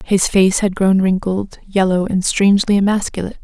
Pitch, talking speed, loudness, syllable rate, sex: 190 Hz, 155 wpm, -15 LUFS, 5.2 syllables/s, female